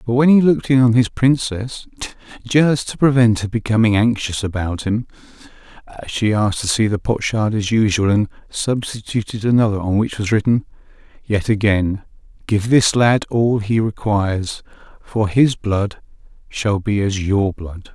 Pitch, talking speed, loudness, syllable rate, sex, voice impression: 110 Hz, 155 wpm, -17 LUFS, 4.7 syllables/s, male, masculine, very adult-like, slightly thick, slightly dark, slightly sincere, calm, slightly kind